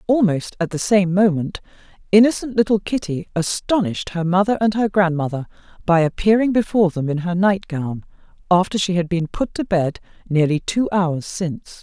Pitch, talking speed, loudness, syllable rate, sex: 185 Hz, 165 wpm, -19 LUFS, 5.2 syllables/s, female